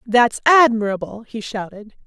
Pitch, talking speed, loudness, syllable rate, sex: 230 Hz, 115 wpm, -17 LUFS, 4.4 syllables/s, female